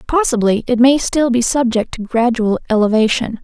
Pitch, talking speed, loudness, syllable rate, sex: 240 Hz, 155 wpm, -15 LUFS, 5.1 syllables/s, female